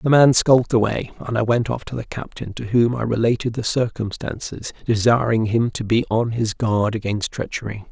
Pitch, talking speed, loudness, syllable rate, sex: 115 Hz, 195 wpm, -20 LUFS, 5.2 syllables/s, male